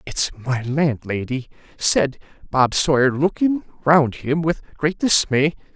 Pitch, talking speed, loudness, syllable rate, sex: 145 Hz, 125 wpm, -20 LUFS, 3.5 syllables/s, male